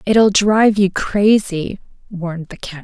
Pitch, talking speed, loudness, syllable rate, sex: 195 Hz, 150 wpm, -15 LUFS, 4.1 syllables/s, female